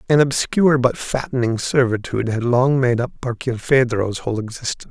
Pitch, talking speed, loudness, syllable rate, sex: 125 Hz, 145 wpm, -19 LUFS, 5.6 syllables/s, male